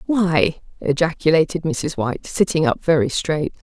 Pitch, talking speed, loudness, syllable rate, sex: 160 Hz, 130 wpm, -19 LUFS, 4.6 syllables/s, female